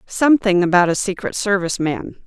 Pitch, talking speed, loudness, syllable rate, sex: 190 Hz, 160 wpm, -17 LUFS, 5.9 syllables/s, female